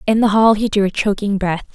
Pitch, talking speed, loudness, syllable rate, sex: 205 Hz, 275 wpm, -16 LUFS, 5.6 syllables/s, female